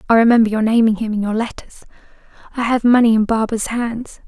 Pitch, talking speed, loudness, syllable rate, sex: 225 Hz, 195 wpm, -16 LUFS, 6.1 syllables/s, female